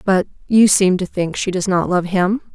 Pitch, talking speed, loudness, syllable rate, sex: 190 Hz, 235 wpm, -17 LUFS, 4.7 syllables/s, female